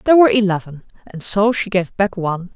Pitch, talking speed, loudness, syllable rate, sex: 205 Hz, 210 wpm, -17 LUFS, 6.1 syllables/s, female